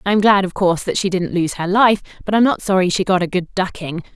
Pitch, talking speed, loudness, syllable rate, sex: 190 Hz, 290 wpm, -17 LUFS, 6.2 syllables/s, female